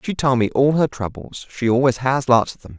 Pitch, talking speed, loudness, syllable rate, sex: 125 Hz, 235 wpm, -19 LUFS, 5.4 syllables/s, male